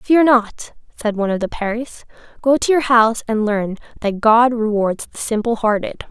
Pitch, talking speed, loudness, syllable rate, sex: 225 Hz, 185 wpm, -17 LUFS, 4.8 syllables/s, female